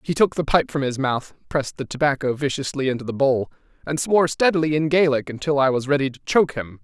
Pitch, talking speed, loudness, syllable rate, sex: 140 Hz, 230 wpm, -21 LUFS, 6.4 syllables/s, male